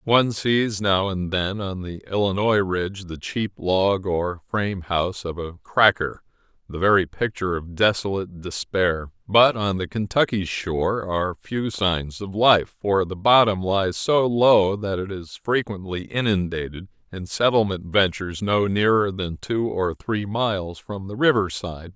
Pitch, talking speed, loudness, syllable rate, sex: 100 Hz, 160 wpm, -22 LUFS, 4.4 syllables/s, male